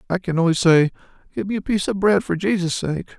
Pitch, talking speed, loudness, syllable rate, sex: 180 Hz, 245 wpm, -20 LUFS, 6.6 syllables/s, male